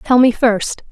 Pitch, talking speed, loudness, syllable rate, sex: 235 Hz, 195 wpm, -14 LUFS, 3.6 syllables/s, female